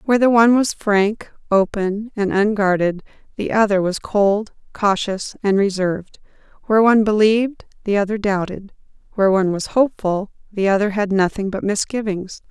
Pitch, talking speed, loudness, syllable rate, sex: 205 Hz, 150 wpm, -18 LUFS, 5.3 syllables/s, female